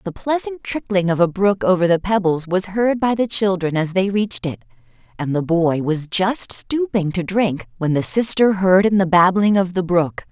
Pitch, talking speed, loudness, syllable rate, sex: 190 Hz, 210 wpm, -18 LUFS, 4.8 syllables/s, female